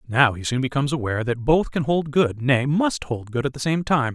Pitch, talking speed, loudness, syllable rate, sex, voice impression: 135 Hz, 260 wpm, -22 LUFS, 5.4 syllables/s, male, masculine, adult-like, slightly cool, refreshing, sincere, friendly